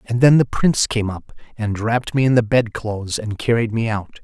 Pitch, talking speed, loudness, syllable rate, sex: 115 Hz, 225 wpm, -19 LUFS, 5.5 syllables/s, male